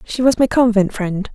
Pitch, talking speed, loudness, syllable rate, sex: 215 Hz, 225 wpm, -16 LUFS, 4.8 syllables/s, female